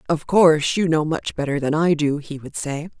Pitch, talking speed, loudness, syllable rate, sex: 155 Hz, 240 wpm, -20 LUFS, 5.2 syllables/s, female